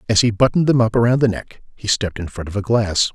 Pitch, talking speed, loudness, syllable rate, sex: 110 Hz, 285 wpm, -18 LUFS, 6.7 syllables/s, male